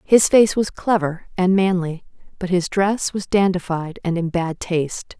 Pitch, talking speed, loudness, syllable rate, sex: 185 Hz, 175 wpm, -19 LUFS, 4.3 syllables/s, female